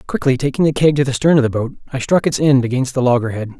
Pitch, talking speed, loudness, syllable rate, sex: 130 Hz, 285 wpm, -16 LUFS, 6.6 syllables/s, male